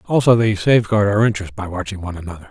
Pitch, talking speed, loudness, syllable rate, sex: 100 Hz, 215 wpm, -17 LUFS, 7.6 syllables/s, male